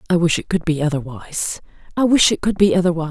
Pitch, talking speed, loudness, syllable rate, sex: 170 Hz, 210 wpm, -18 LUFS, 6.9 syllables/s, female